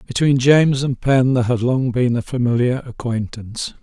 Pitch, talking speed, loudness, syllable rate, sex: 125 Hz, 175 wpm, -18 LUFS, 5.3 syllables/s, male